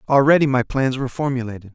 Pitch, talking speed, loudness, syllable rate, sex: 130 Hz, 170 wpm, -19 LUFS, 6.9 syllables/s, male